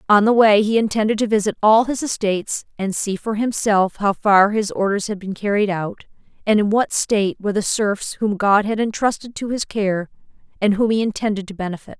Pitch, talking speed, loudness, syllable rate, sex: 210 Hz, 210 wpm, -19 LUFS, 5.4 syllables/s, female